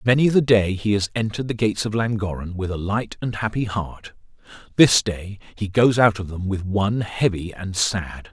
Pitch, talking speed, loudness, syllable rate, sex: 100 Hz, 195 wpm, -21 LUFS, 5.0 syllables/s, male